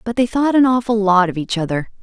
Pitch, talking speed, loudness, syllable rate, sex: 215 Hz, 265 wpm, -16 LUFS, 6.0 syllables/s, female